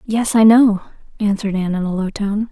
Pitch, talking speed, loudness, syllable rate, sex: 210 Hz, 215 wpm, -16 LUFS, 5.9 syllables/s, female